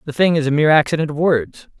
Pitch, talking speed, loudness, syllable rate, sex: 150 Hz, 265 wpm, -16 LUFS, 6.9 syllables/s, male